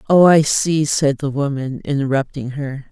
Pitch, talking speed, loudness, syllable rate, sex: 145 Hz, 165 wpm, -17 LUFS, 4.6 syllables/s, female